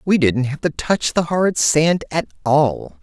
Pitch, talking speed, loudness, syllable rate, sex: 145 Hz, 200 wpm, -18 LUFS, 4.1 syllables/s, male